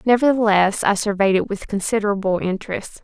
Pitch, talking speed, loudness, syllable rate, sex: 205 Hz, 140 wpm, -19 LUFS, 5.8 syllables/s, female